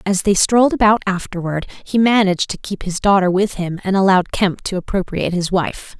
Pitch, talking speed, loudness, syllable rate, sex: 190 Hz, 200 wpm, -17 LUFS, 5.6 syllables/s, female